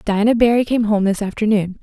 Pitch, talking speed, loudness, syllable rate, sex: 215 Hz, 195 wpm, -17 LUFS, 5.8 syllables/s, female